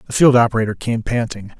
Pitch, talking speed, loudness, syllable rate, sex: 115 Hz, 190 wpm, -17 LUFS, 6.5 syllables/s, male